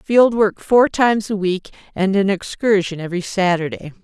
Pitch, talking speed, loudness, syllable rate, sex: 195 Hz, 165 wpm, -18 LUFS, 5.0 syllables/s, female